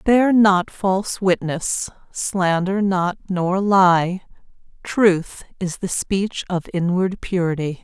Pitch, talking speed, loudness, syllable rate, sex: 185 Hz, 115 wpm, -19 LUFS, 3.2 syllables/s, female